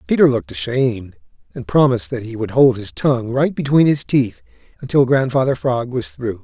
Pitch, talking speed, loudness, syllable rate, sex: 120 Hz, 185 wpm, -17 LUFS, 5.6 syllables/s, male